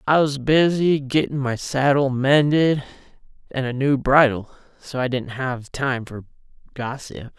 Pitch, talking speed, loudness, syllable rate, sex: 135 Hz, 145 wpm, -20 LUFS, 4.1 syllables/s, male